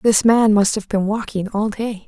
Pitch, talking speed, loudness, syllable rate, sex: 210 Hz, 230 wpm, -18 LUFS, 4.4 syllables/s, female